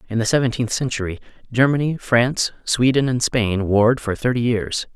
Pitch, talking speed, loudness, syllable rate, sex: 120 Hz, 160 wpm, -19 LUFS, 5.4 syllables/s, male